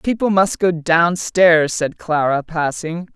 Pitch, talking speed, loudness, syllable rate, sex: 170 Hz, 135 wpm, -17 LUFS, 3.6 syllables/s, female